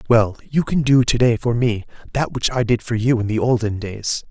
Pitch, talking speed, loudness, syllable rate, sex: 120 Hz, 250 wpm, -19 LUFS, 5.2 syllables/s, male